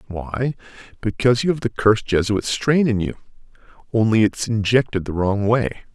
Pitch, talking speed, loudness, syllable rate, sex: 110 Hz, 160 wpm, -20 LUFS, 5.4 syllables/s, male